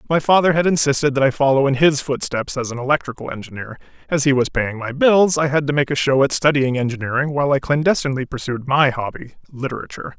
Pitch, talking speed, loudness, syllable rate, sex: 140 Hz, 210 wpm, -18 LUFS, 6.5 syllables/s, male